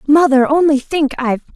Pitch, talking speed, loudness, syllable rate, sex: 285 Hz, 155 wpm, -14 LUFS, 5.7 syllables/s, female